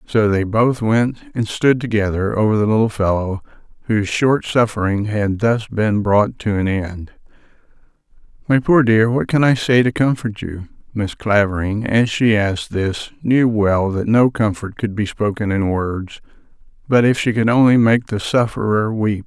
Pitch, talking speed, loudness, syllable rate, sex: 110 Hz, 175 wpm, -17 LUFS, 4.6 syllables/s, male